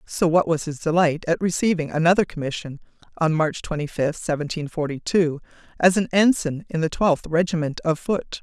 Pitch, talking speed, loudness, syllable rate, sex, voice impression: 165 Hz, 180 wpm, -22 LUFS, 5.3 syllables/s, female, feminine, adult-like, slightly thick, tensed, hard, intellectual, slightly sincere, unique, elegant, lively, slightly sharp